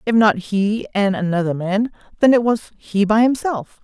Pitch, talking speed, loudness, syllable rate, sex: 210 Hz, 190 wpm, -18 LUFS, 4.7 syllables/s, female